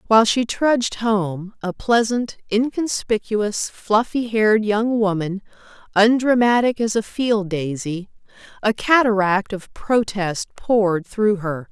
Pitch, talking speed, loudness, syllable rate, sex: 215 Hz, 110 wpm, -19 LUFS, 3.9 syllables/s, female